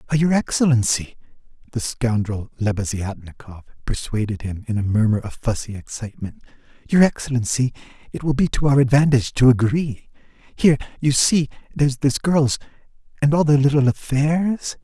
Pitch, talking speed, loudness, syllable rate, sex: 125 Hz, 135 wpm, -20 LUFS, 5.3 syllables/s, male